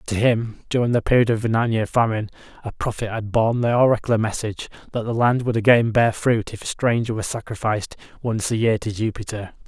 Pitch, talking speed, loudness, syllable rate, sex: 110 Hz, 210 wpm, -21 LUFS, 6.2 syllables/s, male